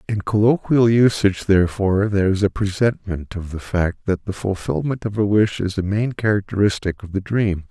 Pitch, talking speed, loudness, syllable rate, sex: 100 Hz, 185 wpm, -20 LUFS, 5.3 syllables/s, male